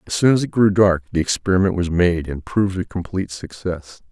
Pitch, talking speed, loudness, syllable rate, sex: 90 Hz, 220 wpm, -19 LUFS, 5.7 syllables/s, male